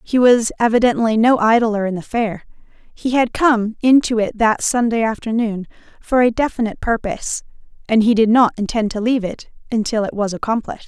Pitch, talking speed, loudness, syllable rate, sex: 225 Hz, 175 wpm, -17 LUFS, 5.5 syllables/s, female